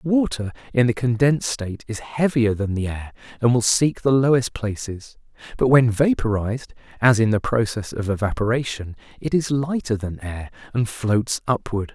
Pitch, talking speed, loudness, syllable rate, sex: 115 Hz, 165 wpm, -21 LUFS, 4.9 syllables/s, male